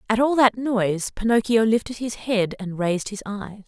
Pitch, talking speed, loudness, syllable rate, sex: 215 Hz, 195 wpm, -22 LUFS, 5.0 syllables/s, female